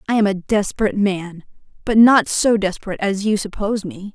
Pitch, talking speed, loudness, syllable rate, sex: 205 Hz, 190 wpm, -18 LUFS, 5.9 syllables/s, female